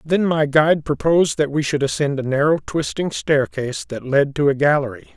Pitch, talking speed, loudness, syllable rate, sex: 145 Hz, 200 wpm, -19 LUFS, 5.5 syllables/s, male